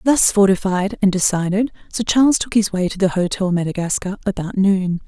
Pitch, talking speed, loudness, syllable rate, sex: 195 Hz, 175 wpm, -18 LUFS, 5.4 syllables/s, female